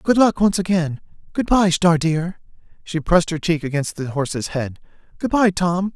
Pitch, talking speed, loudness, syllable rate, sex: 170 Hz, 190 wpm, -20 LUFS, 4.9 syllables/s, male